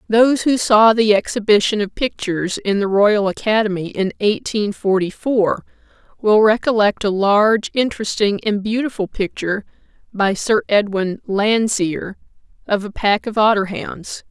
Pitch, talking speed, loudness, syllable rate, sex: 210 Hz, 140 wpm, -17 LUFS, 4.6 syllables/s, female